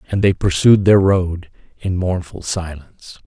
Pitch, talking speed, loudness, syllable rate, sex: 90 Hz, 145 wpm, -16 LUFS, 4.4 syllables/s, male